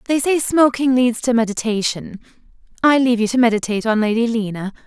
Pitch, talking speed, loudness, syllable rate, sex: 235 Hz, 175 wpm, -17 LUFS, 6.0 syllables/s, female